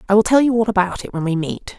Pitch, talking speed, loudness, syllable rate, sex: 200 Hz, 335 wpm, -18 LUFS, 6.8 syllables/s, female